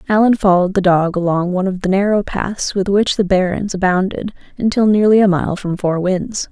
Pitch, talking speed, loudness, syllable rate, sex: 190 Hz, 205 wpm, -15 LUFS, 5.4 syllables/s, female